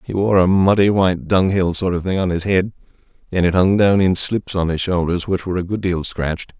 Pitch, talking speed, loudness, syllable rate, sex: 90 Hz, 245 wpm, -17 LUFS, 5.6 syllables/s, male